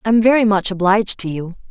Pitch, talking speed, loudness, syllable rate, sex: 205 Hz, 210 wpm, -16 LUFS, 6.1 syllables/s, female